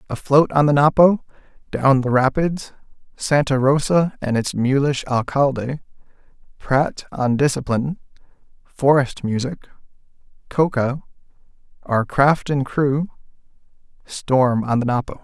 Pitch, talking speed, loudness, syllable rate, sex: 140 Hz, 80 wpm, -19 LUFS, 4.3 syllables/s, male